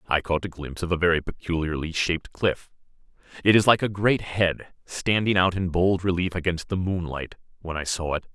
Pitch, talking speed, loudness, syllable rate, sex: 90 Hz, 195 wpm, -24 LUFS, 5.4 syllables/s, male